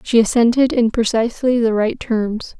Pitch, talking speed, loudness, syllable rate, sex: 230 Hz, 160 wpm, -17 LUFS, 4.8 syllables/s, female